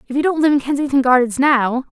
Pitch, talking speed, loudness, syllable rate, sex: 270 Hz, 245 wpm, -16 LUFS, 6.3 syllables/s, female